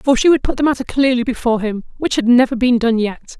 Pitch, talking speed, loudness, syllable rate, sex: 245 Hz, 265 wpm, -16 LUFS, 6.4 syllables/s, female